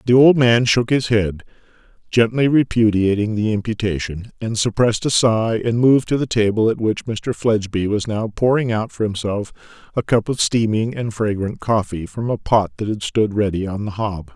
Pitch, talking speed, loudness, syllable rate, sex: 110 Hz, 190 wpm, -19 LUFS, 5.1 syllables/s, male